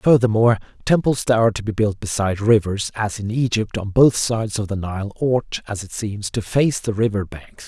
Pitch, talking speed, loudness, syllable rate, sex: 110 Hz, 210 wpm, -20 LUFS, 5.3 syllables/s, male